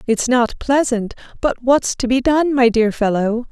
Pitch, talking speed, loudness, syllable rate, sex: 245 Hz, 190 wpm, -17 LUFS, 4.3 syllables/s, female